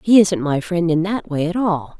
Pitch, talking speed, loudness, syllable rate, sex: 175 Hz, 270 wpm, -18 LUFS, 4.8 syllables/s, female